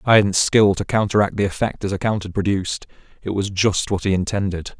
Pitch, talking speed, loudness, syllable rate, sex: 100 Hz, 215 wpm, -20 LUFS, 5.8 syllables/s, male